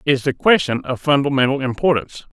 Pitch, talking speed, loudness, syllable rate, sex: 140 Hz, 155 wpm, -18 LUFS, 6.0 syllables/s, male